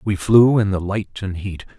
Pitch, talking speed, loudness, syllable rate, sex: 100 Hz, 235 wpm, -18 LUFS, 4.3 syllables/s, male